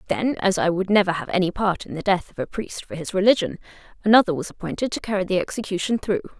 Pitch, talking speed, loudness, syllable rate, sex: 190 Hz, 235 wpm, -22 LUFS, 6.7 syllables/s, female